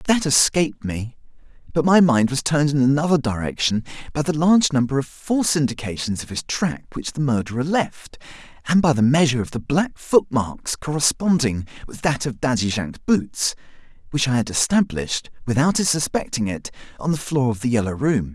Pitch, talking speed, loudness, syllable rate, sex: 140 Hz, 185 wpm, -21 LUFS, 5.5 syllables/s, male